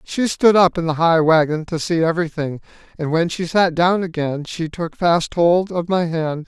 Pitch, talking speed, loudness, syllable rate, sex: 165 Hz, 215 wpm, -18 LUFS, 4.6 syllables/s, male